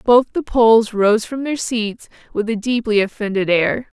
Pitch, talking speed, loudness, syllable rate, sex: 225 Hz, 180 wpm, -17 LUFS, 4.4 syllables/s, female